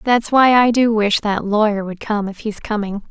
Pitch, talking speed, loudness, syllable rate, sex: 215 Hz, 230 wpm, -17 LUFS, 4.8 syllables/s, female